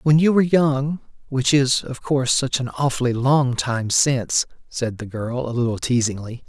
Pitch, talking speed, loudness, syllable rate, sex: 130 Hz, 175 wpm, -20 LUFS, 4.8 syllables/s, male